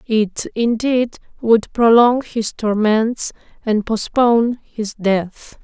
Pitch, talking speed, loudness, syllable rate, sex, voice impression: 225 Hz, 105 wpm, -17 LUFS, 3.1 syllables/s, female, feminine, adult-like, relaxed, weak, soft, halting, calm, reassuring, elegant, kind, modest